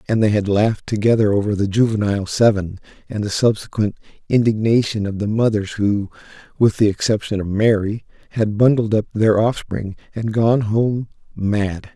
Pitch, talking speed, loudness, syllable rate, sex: 105 Hz, 155 wpm, -18 LUFS, 5.1 syllables/s, male